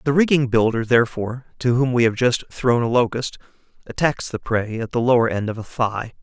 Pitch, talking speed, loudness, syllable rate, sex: 120 Hz, 210 wpm, -20 LUFS, 5.6 syllables/s, male